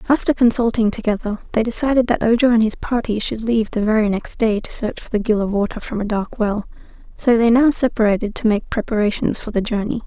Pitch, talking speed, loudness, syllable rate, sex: 220 Hz, 220 wpm, -18 LUFS, 6.1 syllables/s, female